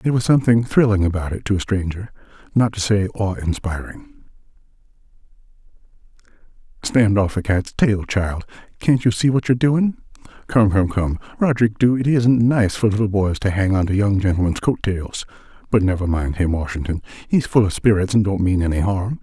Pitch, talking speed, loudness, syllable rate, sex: 105 Hz, 170 wpm, -19 LUFS, 5.5 syllables/s, male